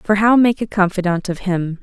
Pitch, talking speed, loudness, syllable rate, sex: 195 Hz, 230 wpm, -17 LUFS, 5.0 syllables/s, female